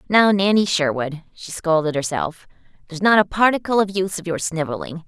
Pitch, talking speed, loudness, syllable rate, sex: 180 Hz, 175 wpm, -19 LUFS, 5.7 syllables/s, female